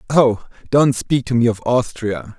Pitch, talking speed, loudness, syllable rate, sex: 120 Hz, 175 wpm, -18 LUFS, 4.1 syllables/s, male